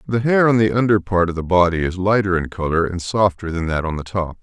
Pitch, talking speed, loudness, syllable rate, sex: 95 Hz, 270 wpm, -18 LUFS, 5.9 syllables/s, male